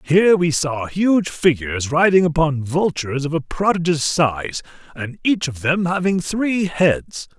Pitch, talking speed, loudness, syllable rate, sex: 160 Hz, 155 wpm, -18 LUFS, 4.2 syllables/s, male